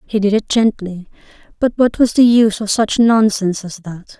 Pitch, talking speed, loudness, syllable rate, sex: 210 Hz, 200 wpm, -14 LUFS, 5.1 syllables/s, female